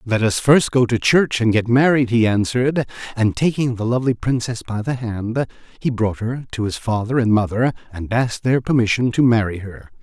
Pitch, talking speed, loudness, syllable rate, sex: 120 Hz, 205 wpm, -19 LUFS, 5.3 syllables/s, male